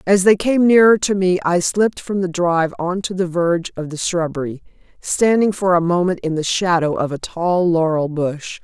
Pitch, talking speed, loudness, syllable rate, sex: 175 Hz, 210 wpm, -17 LUFS, 4.9 syllables/s, female